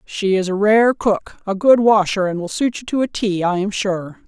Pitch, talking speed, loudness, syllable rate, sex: 205 Hz, 255 wpm, -17 LUFS, 4.8 syllables/s, female